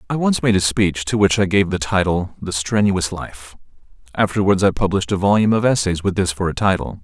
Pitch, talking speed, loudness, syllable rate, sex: 95 Hz, 220 wpm, -18 LUFS, 5.8 syllables/s, male